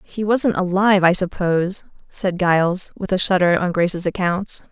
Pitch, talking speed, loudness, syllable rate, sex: 185 Hz, 165 wpm, -19 LUFS, 4.8 syllables/s, female